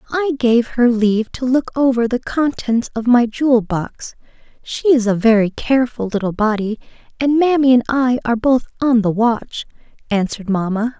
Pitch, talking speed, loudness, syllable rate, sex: 240 Hz, 170 wpm, -16 LUFS, 5.0 syllables/s, female